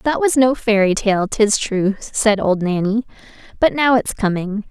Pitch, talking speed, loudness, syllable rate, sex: 215 Hz, 180 wpm, -17 LUFS, 4.2 syllables/s, female